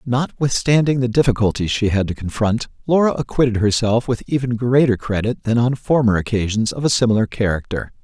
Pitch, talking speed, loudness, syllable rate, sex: 115 Hz, 165 wpm, -18 LUFS, 5.6 syllables/s, male